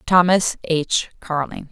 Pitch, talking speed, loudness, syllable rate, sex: 165 Hz, 105 wpm, -19 LUFS, 3.5 syllables/s, female